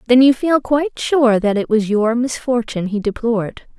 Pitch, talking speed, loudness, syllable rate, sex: 235 Hz, 190 wpm, -17 LUFS, 5.1 syllables/s, female